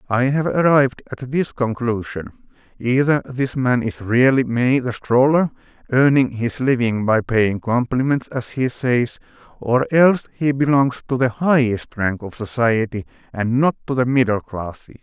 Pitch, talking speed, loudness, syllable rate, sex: 125 Hz, 150 wpm, -19 LUFS, 4.5 syllables/s, male